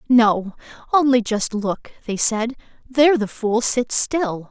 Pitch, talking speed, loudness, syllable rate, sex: 235 Hz, 145 wpm, -19 LUFS, 3.7 syllables/s, female